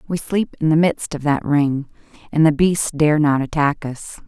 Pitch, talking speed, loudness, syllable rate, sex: 155 Hz, 210 wpm, -18 LUFS, 4.4 syllables/s, female